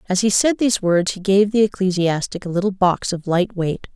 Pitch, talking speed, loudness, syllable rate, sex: 190 Hz, 230 wpm, -19 LUFS, 5.3 syllables/s, female